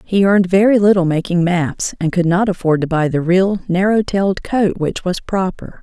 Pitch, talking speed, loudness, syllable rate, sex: 185 Hz, 205 wpm, -16 LUFS, 5.0 syllables/s, female